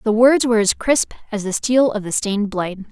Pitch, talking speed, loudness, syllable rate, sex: 220 Hz, 245 wpm, -18 LUFS, 5.8 syllables/s, female